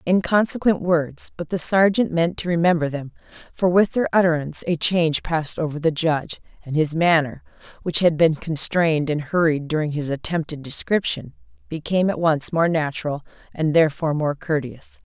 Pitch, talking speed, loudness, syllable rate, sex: 160 Hz, 165 wpm, -20 LUFS, 5.4 syllables/s, female